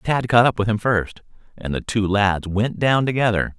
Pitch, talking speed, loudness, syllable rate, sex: 105 Hz, 220 wpm, -19 LUFS, 4.7 syllables/s, male